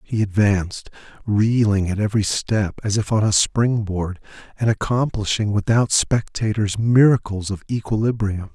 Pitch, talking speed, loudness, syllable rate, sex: 105 Hz, 135 wpm, -20 LUFS, 4.7 syllables/s, male